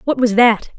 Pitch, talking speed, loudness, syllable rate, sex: 235 Hz, 230 wpm, -14 LUFS, 4.8 syllables/s, female